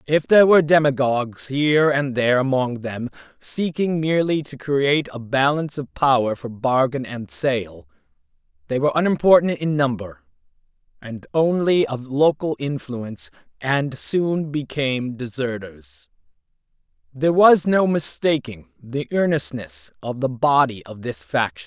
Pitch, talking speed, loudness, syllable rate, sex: 140 Hz, 130 wpm, -20 LUFS, 4.6 syllables/s, male